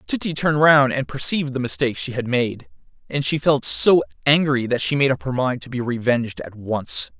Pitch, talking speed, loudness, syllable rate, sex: 135 Hz, 215 wpm, -20 LUFS, 5.5 syllables/s, male